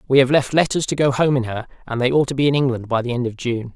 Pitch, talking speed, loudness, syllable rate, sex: 130 Hz, 335 wpm, -19 LUFS, 6.8 syllables/s, male